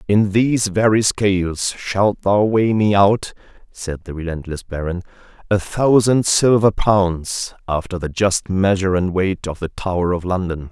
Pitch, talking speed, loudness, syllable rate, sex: 95 Hz, 155 wpm, -18 LUFS, 4.3 syllables/s, male